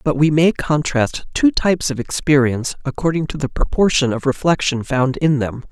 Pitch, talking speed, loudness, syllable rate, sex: 145 Hz, 180 wpm, -18 LUFS, 5.2 syllables/s, male